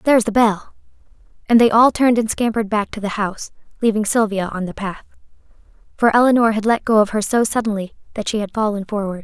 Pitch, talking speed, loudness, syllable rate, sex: 215 Hz, 210 wpm, -18 LUFS, 6.4 syllables/s, female